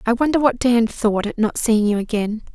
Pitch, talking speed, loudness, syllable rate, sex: 230 Hz, 235 wpm, -19 LUFS, 5.2 syllables/s, female